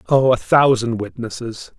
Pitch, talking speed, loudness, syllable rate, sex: 120 Hz, 135 wpm, -17 LUFS, 4.2 syllables/s, male